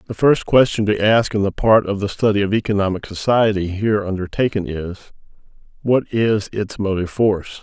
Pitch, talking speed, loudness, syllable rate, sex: 105 Hz, 175 wpm, -18 LUFS, 5.5 syllables/s, male